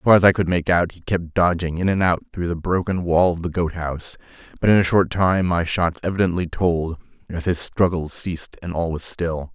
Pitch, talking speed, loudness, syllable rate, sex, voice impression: 85 Hz, 240 wpm, -21 LUFS, 5.4 syllables/s, male, very masculine, slightly old, very thick, very tensed, weak, dark, soft, muffled, fluent, slightly raspy, very cool, intellectual, slightly refreshing, sincere, very calm, very mature, very friendly, very reassuring, unique, elegant, wild, sweet, slightly lively, kind, slightly modest